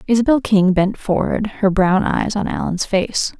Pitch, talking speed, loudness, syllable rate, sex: 205 Hz, 175 wpm, -17 LUFS, 4.4 syllables/s, female